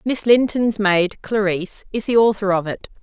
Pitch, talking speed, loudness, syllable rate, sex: 205 Hz, 180 wpm, -18 LUFS, 4.8 syllables/s, female